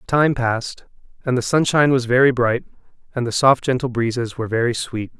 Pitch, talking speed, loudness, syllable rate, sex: 125 Hz, 185 wpm, -19 LUFS, 5.8 syllables/s, male